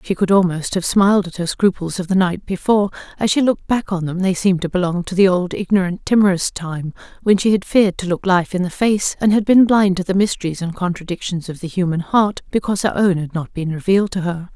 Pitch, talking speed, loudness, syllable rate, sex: 185 Hz, 245 wpm, -18 LUFS, 6.1 syllables/s, female